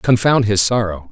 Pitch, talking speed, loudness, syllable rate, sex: 110 Hz, 160 wpm, -15 LUFS, 4.7 syllables/s, male